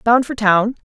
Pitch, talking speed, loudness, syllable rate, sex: 225 Hz, 195 wpm, -16 LUFS, 4.1 syllables/s, female